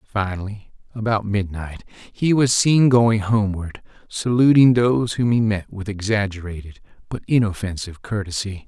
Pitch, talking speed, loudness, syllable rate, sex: 105 Hz, 125 wpm, -19 LUFS, 4.9 syllables/s, male